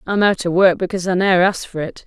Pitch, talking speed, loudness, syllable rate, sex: 185 Hz, 290 wpm, -17 LUFS, 7.2 syllables/s, female